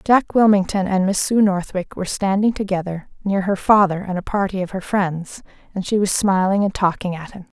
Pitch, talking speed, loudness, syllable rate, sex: 190 Hz, 205 wpm, -19 LUFS, 5.4 syllables/s, female